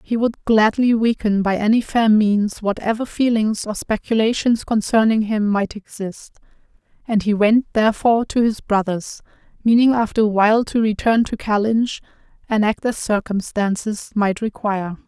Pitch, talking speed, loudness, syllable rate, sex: 215 Hz, 145 wpm, -18 LUFS, 4.8 syllables/s, female